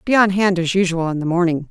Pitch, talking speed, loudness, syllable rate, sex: 180 Hz, 280 wpm, -17 LUFS, 6.2 syllables/s, female